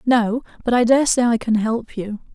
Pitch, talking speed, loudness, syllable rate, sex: 230 Hz, 230 wpm, -19 LUFS, 4.8 syllables/s, female